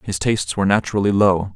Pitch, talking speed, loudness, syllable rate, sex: 100 Hz, 195 wpm, -18 LUFS, 6.9 syllables/s, male